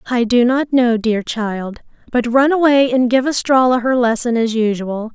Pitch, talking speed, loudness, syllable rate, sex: 240 Hz, 185 wpm, -15 LUFS, 4.5 syllables/s, female